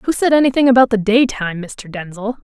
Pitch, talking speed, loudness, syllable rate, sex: 230 Hz, 195 wpm, -15 LUFS, 6.2 syllables/s, female